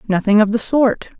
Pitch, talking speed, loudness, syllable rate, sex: 220 Hz, 200 wpm, -15 LUFS, 5.2 syllables/s, female